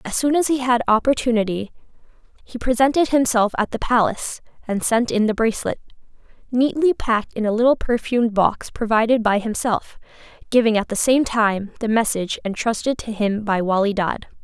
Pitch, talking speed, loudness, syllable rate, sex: 225 Hz, 165 wpm, -20 LUFS, 5.5 syllables/s, female